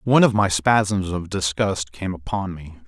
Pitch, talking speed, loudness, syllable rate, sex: 95 Hz, 190 wpm, -21 LUFS, 4.5 syllables/s, male